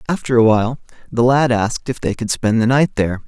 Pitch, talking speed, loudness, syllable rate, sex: 120 Hz, 240 wpm, -17 LUFS, 6.3 syllables/s, male